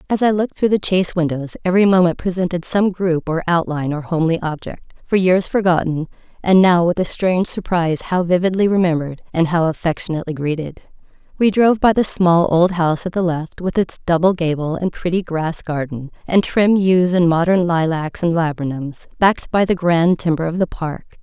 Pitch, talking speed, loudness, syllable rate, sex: 175 Hz, 190 wpm, -17 LUFS, 5.6 syllables/s, female